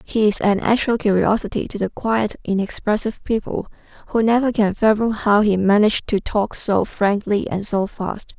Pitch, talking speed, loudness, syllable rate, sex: 210 Hz, 170 wpm, -19 LUFS, 4.9 syllables/s, female